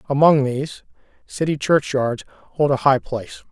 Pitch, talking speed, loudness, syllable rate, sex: 140 Hz, 135 wpm, -19 LUFS, 5.2 syllables/s, male